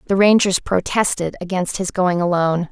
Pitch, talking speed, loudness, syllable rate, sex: 185 Hz, 155 wpm, -18 LUFS, 5.2 syllables/s, female